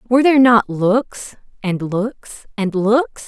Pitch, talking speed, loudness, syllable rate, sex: 220 Hz, 145 wpm, -16 LUFS, 3.4 syllables/s, female